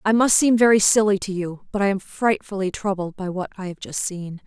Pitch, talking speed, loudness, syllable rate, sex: 195 Hz, 240 wpm, -21 LUFS, 5.5 syllables/s, female